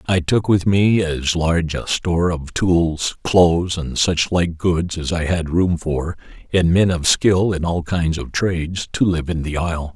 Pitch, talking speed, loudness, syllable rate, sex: 85 Hz, 205 wpm, -18 LUFS, 4.2 syllables/s, male